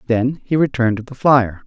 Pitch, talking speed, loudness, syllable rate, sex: 125 Hz, 215 wpm, -17 LUFS, 5.4 syllables/s, male